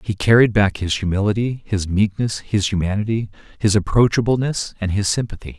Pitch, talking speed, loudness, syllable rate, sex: 105 Hz, 150 wpm, -19 LUFS, 5.5 syllables/s, male